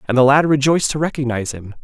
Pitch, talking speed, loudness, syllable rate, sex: 135 Hz, 230 wpm, -16 LUFS, 7.5 syllables/s, male